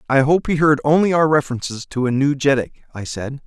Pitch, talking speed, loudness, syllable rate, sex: 140 Hz, 225 wpm, -18 LUFS, 5.9 syllables/s, male